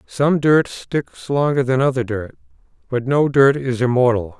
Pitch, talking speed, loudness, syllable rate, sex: 130 Hz, 165 wpm, -18 LUFS, 4.3 syllables/s, male